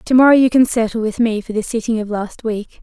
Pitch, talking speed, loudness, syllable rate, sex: 225 Hz, 275 wpm, -16 LUFS, 5.9 syllables/s, female